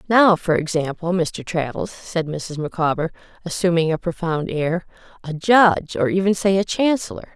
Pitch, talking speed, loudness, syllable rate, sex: 175 Hz, 155 wpm, -20 LUFS, 4.8 syllables/s, female